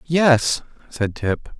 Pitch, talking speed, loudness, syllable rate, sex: 135 Hz, 115 wpm, -20 LUFS, 2.4 syllables/s, male